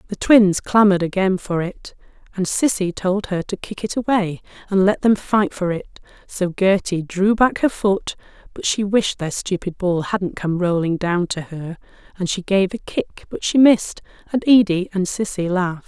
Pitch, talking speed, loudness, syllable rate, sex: 190 Hz, 195 wpm, -19 LUFS, 4.7 syllables/s, female